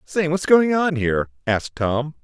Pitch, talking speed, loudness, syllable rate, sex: 145 Hz, 160 wpm, -20 LUFS, 4.7 syllables/s, male